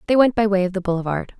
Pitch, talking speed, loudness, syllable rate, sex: 200 Hz, 300 wpm, -20 LUFS, 7.4 syllables/s, female